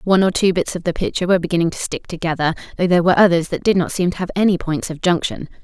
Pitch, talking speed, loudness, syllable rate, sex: 175 Hz, 275 wpm, -18 LUFS, 7.5 syllables/s, female